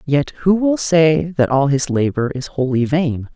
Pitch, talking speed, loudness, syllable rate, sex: 145 Hz, 195 wpm, -17 LUFS, 4.3 syllables/s, female